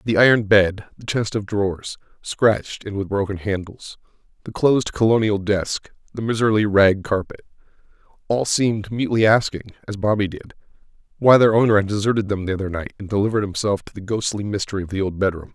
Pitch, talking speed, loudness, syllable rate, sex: 105 Hz, 180 wpm, -20 LUFS, 6.0 syllables/s, male